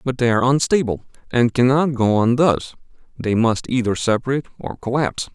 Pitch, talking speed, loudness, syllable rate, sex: 125 Hz, 170 wpm, -19 LUFS, 6.1 syllables/s, male